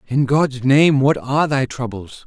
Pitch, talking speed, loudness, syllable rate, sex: 135 Hz, 185 wpm, -17 LUFS, 4.2 syllables/s, male